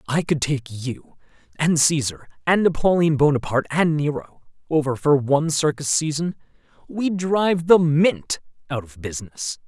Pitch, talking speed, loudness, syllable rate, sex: 150 Hz, 150 wpm, -21 LUFS, 4.9 syllables/s, male